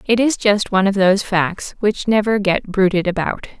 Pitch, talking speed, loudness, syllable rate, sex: 200 Hz, 200 wpm, -17 LUFS, 5.1 syllables/s, female